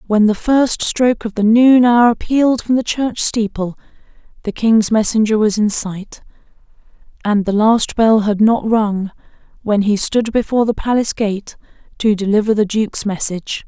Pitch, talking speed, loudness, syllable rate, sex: 220 Hz, 165 wpm, -15 LUFS, 4.8 syllables/s, female